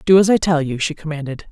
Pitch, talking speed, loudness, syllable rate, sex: 160 Hz, 280 wpm, -18 LUFS, 6.4 syllables/s, female